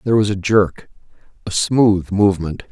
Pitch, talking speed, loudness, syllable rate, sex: 100 Hz, 135 wpm, -17 LUFS, 5.1 syllables/s, male